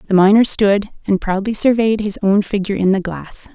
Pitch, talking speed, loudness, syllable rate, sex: 200 Hz, 205 wpm, -16 LUFS, 5.4 syllables/s, female